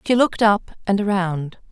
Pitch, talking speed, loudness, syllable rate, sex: 200 Hz, 175 wpm, -20 LUFS, 5.1 syllables/s, female